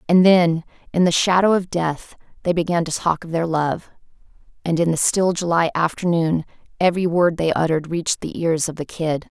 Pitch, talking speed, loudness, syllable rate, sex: 170 Hz, 190 wpm, -20 LUFS, 5.4 syllables/s, female